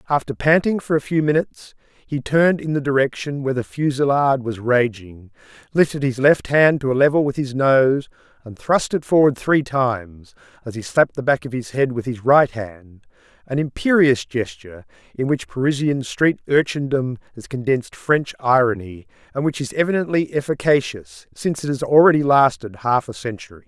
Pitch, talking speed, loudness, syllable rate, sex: 135 Hz, 175 wpm, -19 LUFS, 5.3 syllables/s, male